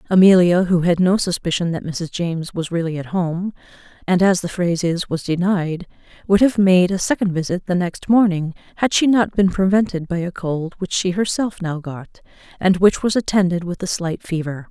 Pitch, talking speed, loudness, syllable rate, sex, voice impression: 180 Hz, 200 wpm, -19 LUFS, 5.2 syllables/s, female, feminine, adult-like, slightly soft, slightly sincere, calm, slightly sweet